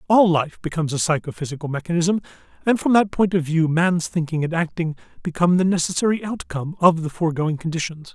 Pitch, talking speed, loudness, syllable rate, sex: 170 Hz, 175 wpm, -21 LUFS, 6.2 syllables/s, male